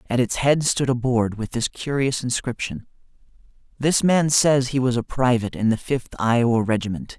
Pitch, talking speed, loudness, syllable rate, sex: 125 Hz, 185 wpm, -21 LUFS, 5.2 syllables/s, male